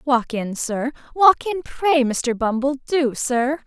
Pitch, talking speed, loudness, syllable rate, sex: 270 Hz, 165 wpm, -20 LUFS, 3.7 syllables/s, female